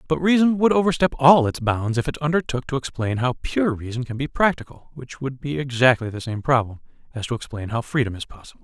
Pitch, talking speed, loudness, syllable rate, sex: 135 Hz, 220 wpm, -21 LUFS, 6.0 syllables/s, male